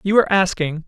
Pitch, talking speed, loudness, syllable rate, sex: 185 Hz, 205 wpm, -18 LUFS, 6.9 syllables/s, male